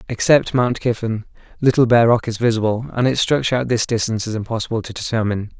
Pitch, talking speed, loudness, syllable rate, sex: 115 Hz, 195 wpm, -18 LUFS, 6.6 syllables/s, male